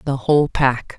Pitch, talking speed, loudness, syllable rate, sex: 135 Hz, 185 wpm, -18 LUFS, 4.7 syllables/s, female